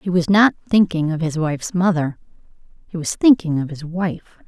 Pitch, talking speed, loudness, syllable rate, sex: 175 Hz, 175 wpm, -18 LUFS, 5.4 syllables/s, female